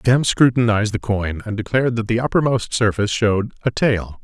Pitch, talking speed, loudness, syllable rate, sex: 110 Hz, 185 wpm, -19 LUFS, 5.8 syllables/s, male